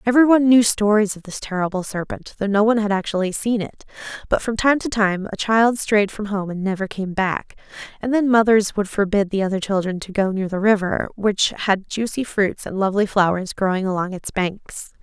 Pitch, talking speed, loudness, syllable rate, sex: 205 Hz, 210 wpm, -20 LUFS, 5.4 syllables/s, female